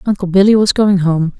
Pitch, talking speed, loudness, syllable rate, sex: 190 Hz, 215 wpm, -12 LUFS, 5.6 syllables/s, female